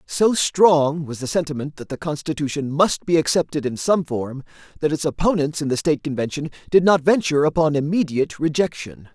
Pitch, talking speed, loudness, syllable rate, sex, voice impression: 155 Hz, 175 wpm, -20 LUFS, 5.6 syllables/s, male, masculine, adult-like, powerful, bright, clear, fluent, slightly raspy, slightly cool, refreshing, friendly, wild, lively, intense